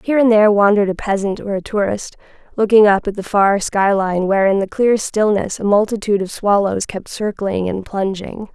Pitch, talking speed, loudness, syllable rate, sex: 205 Hz, 205 wpm, -16 LUFS, 5.5 syllables/s, female